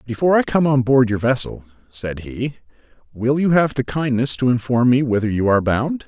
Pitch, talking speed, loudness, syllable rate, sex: 125 Hz, 210 wpm, -18 LUFS, 5.4 syllables/s, male